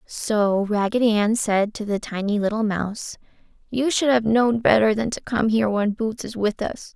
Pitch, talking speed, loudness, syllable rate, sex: 220 Hz, 200 wpm, -21 LUFS, 4.8 syllables/s, female